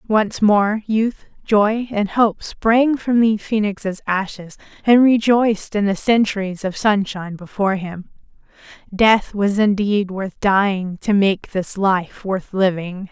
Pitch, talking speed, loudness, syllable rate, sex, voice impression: 205 Hz, 140 wpm, -18 LUFS, 3.8 syllables/s, female, very feminine, very young, slightly adult-like, thin, tensed, slightly powerful, very bright, slightly soft, slightly muffled, very fluent, slightly cute, intellectual, refreshing, slightly sincere, slightly calm, slightly unique, lively, kind, slightly modest